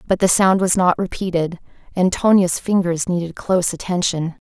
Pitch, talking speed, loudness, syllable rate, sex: 180 Hz, 160 wpm, -18 LUFS, 5.2 syllables/s, female